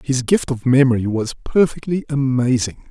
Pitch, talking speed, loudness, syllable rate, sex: 135 Hz, 145 wpm, -18 LUFS, 4.9 syllables/s, male